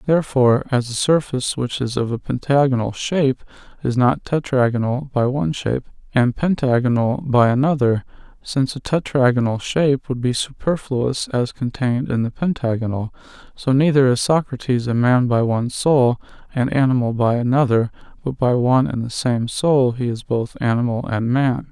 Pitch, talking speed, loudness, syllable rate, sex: 130 Hz, 155 wpm, -19 LUFS, 5.2 syllables/s, male